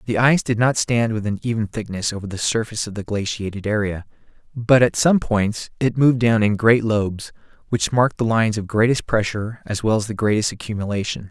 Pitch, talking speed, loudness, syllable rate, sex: 110 Hz, 205 wpm, -20 LUFS, 5.9 syllables/s, male